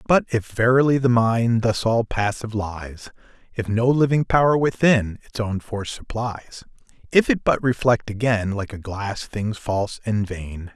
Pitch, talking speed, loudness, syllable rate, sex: 110 Hz, 165 wpm, -21 LUFS, 4.4 syllables/s, male